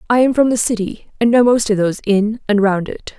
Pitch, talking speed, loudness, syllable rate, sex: 220 Hz, 265 wpm, -15 LUFS, 5.6 syllables/s, female